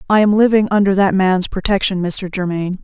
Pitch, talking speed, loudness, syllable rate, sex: 195 Hz, 190 wpm, -15 LUFS, 5.8 syllables/s, female